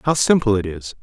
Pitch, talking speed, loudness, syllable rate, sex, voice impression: 115 Hz, 235 wpm, -17 LUFS, 5.8 syllables/s, male, very masculine, adult-like, slightly middle-aged, slightly thick, slightly tensed, slightly weak, slightly dark, soft, muffled, very fluent, slightly raspy, very cool, very intellectual, very sincere, very calm, very mature, friendly, reassuring, unique, slightly elegant, very wild, sweet, lively, very kind